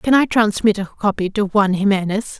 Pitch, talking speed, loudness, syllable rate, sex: 205 Hz, 200 wpm, -17 LUFS, 5.5 syllables/s, female